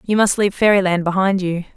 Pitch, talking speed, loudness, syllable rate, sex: 190 Hz, 205 wpm, -17 LUFS, 6.5 syllables/s, female